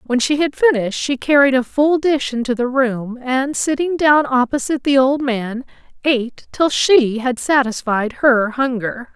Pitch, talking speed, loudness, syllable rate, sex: 260 Hz, 170 wpm, -17 LUFS, 4.4 syllables/s, female